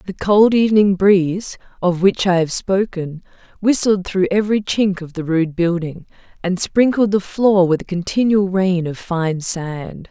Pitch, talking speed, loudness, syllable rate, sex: 185 Hz, 165 wpm, -17 LUFS, 4.4 syllables/s, female